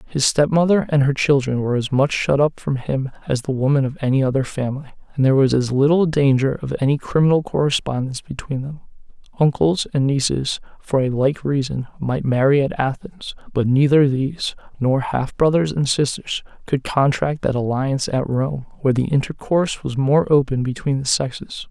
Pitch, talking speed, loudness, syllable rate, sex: 140 Hz, 180 wpm, -19 LUFS, 5.4 syllables/s, male